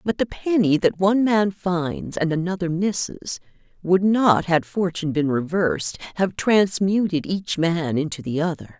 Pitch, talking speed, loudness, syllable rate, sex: 175 Hz, 155 wpm, -21 LUFS, 4.5 syllables/s, female